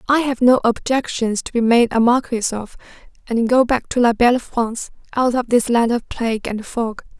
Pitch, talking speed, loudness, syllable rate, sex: 240 Hz, 210 wpm, -18 LUFS, 5.3 syllables/s, female